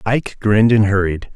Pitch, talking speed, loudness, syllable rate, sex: 105 Hz, 180 wpm, -15 LUFS, 5.9 syllables/s, male